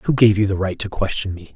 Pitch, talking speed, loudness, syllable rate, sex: 100 Hz, 310 wpm, -19 LUFS, 6.0 syllables/s, male